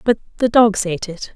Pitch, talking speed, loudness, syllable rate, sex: 210 Hz, 220 wpm, -17 LUFS, 5.8 syllables/s, female